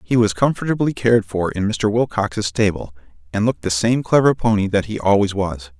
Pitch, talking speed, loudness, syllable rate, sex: 105 Hz, 195 wpm, -18 LUFS, 5.5 syllables/s, male